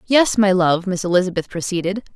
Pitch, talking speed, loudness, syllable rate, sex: 190 Hz, 165 wpm, -18 LUFS, 5.8 syllables/s, female